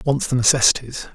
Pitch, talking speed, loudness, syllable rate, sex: 125 Hz, 155 wpm, -17 LUFS, 5.9 syllables/s, male